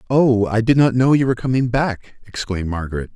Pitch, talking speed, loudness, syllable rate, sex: 115 Hz, 210 wpm, -18 LUFS, 6.1 syllables/s, male